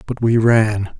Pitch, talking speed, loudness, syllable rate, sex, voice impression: 110 Hz, 180 wpm, -16 LUFS, 3.6 syllables/s, male, very masculine, slightly old, thick, very relaxed, weak, dark, hard, muffled, slightly halting, slightly raspy, cool, intellectual, slightly refreshing, very sincere, very calm, very mature, slightly friendly, very reassuring, very unique, slightly elegant, very wild, sweet, slightly lively, slightly strict, slightly modest